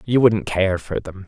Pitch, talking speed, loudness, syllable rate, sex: 100 Hz, 280 wpm, -20 LUFS, 5.1 syllables/s, male